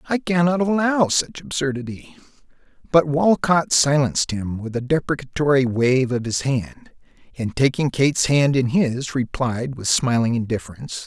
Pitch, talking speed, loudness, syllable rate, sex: 135 Hz, 140 wpm, -20 LUFS, 4.7 syllables/s, male